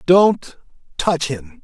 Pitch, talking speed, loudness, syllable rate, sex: 155 Hz, 110 wpm, -18 LUFS, 2.7 syllables/s, male